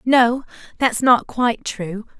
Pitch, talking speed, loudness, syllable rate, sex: 235 Hz, 135 wpm, -19 LUFS, 3.7 syllables/s, female